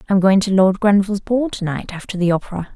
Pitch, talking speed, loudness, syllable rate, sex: 195 Hz, 260 wpm, -17 LUFS, 6.6 syllables/s, female